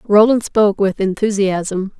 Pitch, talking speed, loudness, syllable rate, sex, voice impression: 200 Hz, 120 wpm, -16 LUFS, 4.3 syllables/s, female, very gender-neutral, young, slightly thin, slightly tensed, slightly weak, slightly dark, slightly soft, clear, fluent, slightly cute, slightly cool, intellectual, slightly refreshing, slightly sincere, calm, very friendly, slightly reassuring, slightly lively, slightly kind